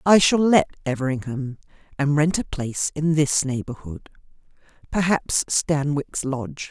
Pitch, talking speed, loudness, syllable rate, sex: 145 Hz, 125 wpm, -22 LUFS, 4.5 syllables/s, female